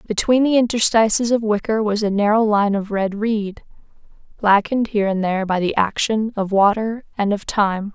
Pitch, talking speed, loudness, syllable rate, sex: 210 Hz, 180 wpm, -18 LUFS, 5.2 syllables/s, female